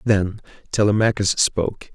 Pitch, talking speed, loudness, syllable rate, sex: 100 Hz, 90 wpm, -20 LUFS, 4.6 syllables/s, male